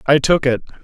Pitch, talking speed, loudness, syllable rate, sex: 140 Hz, 215 wpm, -16 LUFS, 5.7 syllables/s, male